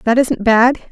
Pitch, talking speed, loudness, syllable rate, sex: 240 Hz, 200 wpm, -13 LUFS, 3.9 syllables/s, female